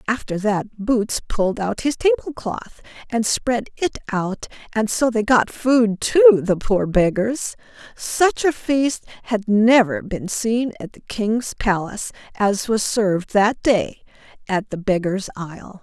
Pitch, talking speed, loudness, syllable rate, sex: 220 Hz, 155 wpm, -20 LUFS, 4.0 syllables/s, female